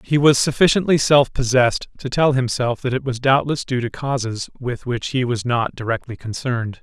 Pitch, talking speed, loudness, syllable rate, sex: 125 Hz, 195 wpm, -19 LUFS, 5.2 syllables/s, male